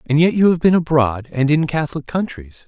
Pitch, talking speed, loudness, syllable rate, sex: 150 Hz, 225 wpm, -17 LUFS, 5.6 syllables/s, male